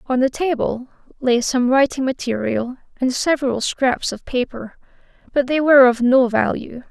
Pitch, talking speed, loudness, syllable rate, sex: 255 Hz, 155 wpm, -18 LUFS, 4.7 syllables/s, female